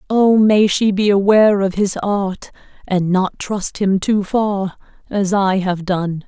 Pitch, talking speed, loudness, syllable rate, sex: 195 Hz, 165 wpm, -16 LUFS, 3.5 syllables/s, female